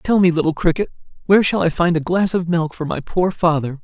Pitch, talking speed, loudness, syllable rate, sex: 170 Hz, 250 wpm, -18 LUFS, 5.9 syllables/s, male